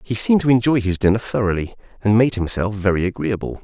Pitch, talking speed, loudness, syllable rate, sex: 105 Hz, 200 wpm, -18 LUFS, 6.4 syllables/s, male